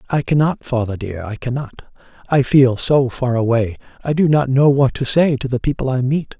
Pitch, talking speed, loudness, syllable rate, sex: 130 Hz, 215 wpm, -17 LUFS, 5.1 syllables/s, male